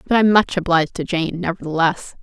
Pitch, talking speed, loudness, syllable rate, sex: 175 Hz, 190 wpm, -18 LUFS, 6.1 syllables/s, female